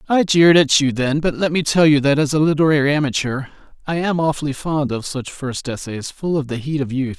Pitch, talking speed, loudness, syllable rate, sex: 145 Hz, 240 wpm, -18 LUFS, 5.7 syllables/s, male